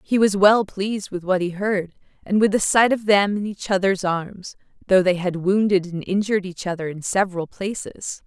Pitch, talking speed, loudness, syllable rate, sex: 195 Hz, 210 wpm, -21 LUFS, 5.0 syllables/s, female